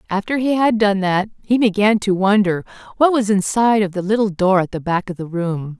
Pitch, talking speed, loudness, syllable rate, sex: 200 Hz, 230 wpm, -17 LUFS, 5.5 syllables/s, female